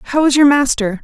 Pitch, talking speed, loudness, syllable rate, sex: 265 Hz, 230 wpm, -12 LUFS, 5.1 syllables/s, female